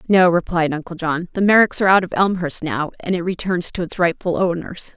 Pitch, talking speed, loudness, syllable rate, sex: 175 Hz, 220 wpm, -18 LUFS, 5.7 syllables/s, female